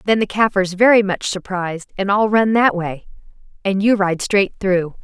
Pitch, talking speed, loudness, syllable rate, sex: 195 Hz, 190 wpm, -17 LUFS, 4.8 syllables/s, female